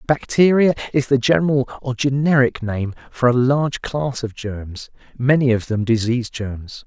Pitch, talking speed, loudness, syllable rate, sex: 125 Hz, 155 wpm, -19 LUFS, 4.6 syllables/s, male